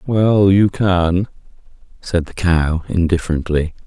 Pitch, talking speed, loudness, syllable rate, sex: 90 Hz, 110 wpm, -16 LUFS, 3.8 syllables/s, male